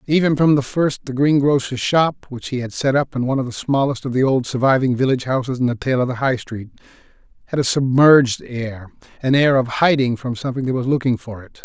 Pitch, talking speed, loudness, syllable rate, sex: 130 Hz, 235 wpm, -18 LUFS, 6.0 syllables/s, male